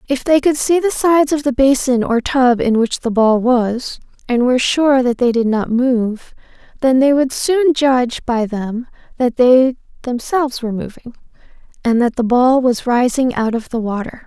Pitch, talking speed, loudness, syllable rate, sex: 250 Hz, 195 wpm, -15 LUFS, 4.6 syllables/s, female